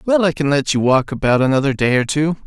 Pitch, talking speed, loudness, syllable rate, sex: 145 Hz, 270 wpm, -16 LUFS, 6.2 syllables/s, male